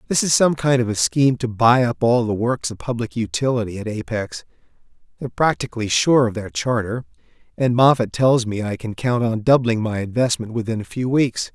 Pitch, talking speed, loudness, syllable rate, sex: 120 Hz, 205 wpm, -19 LUFS, 5.5 syllables/s, male